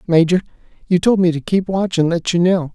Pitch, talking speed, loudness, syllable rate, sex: 175 Hz, 240 wpm, -16 LUFS, 5.6 syllables/s, male